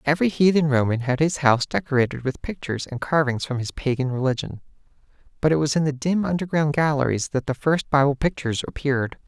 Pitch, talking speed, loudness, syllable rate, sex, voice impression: 140 Hz, 190 wpm, -22 LUFS, 6.3 syllables/s, male, masculine, slightly gender-neutral, adult-like, slightly middle-aged, slightly thick, slightly relaxed, weak, slightly dark, slightly soft, slightly muffled, fluent, slightly cool, slightly intellectual, refreshing, sincere, calm, slightly friendly, reassuring, unique, elegant, slightly sweet, slightly kind, very modest